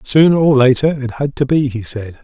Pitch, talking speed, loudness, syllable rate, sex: 135 Hz, 240 wpm, -14 LUFS, 5.2 syllables/s, male